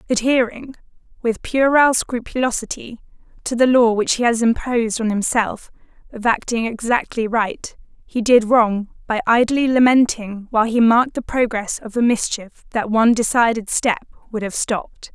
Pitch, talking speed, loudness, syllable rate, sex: 230 Hz, 150 wpm, -18 LUFS, 4.9 syllables/s, female